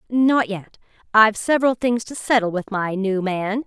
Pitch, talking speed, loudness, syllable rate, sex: 215 Hz, 180 wpm, -20 LUFS, 4.9 syllables/s, female